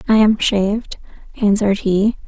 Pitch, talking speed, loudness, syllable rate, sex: 205 Hz, 130 wpm, -16 LUFS, 4.9 syllables/s, female